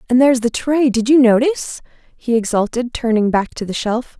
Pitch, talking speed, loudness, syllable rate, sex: 240 Hz, 185 wpm, -16 LUFS, 5.4 syllables/s, female